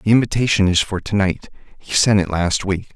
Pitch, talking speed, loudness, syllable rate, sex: 100 Hz, 205 wpm, -18 LUFS, 5.7 syllables/s, male